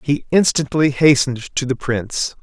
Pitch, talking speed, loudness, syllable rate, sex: 135 Hz, 150 wpm, -17 LUFS, 4.9 syllables/s, male